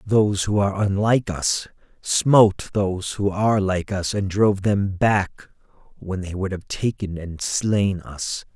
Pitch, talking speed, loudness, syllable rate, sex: 100 Hz, 160 wpm, -21 LUFS, 4.3 syllables/s, male